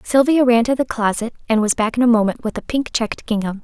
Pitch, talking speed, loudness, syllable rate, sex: 230 Hz, 265 wpm, -18 LUFS, 6.2 syllables/s, female